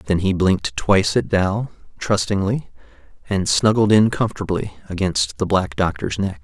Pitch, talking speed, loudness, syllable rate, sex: 95 Hz, 150 wpm, -19 LUFS, 4.8 syllables/s, male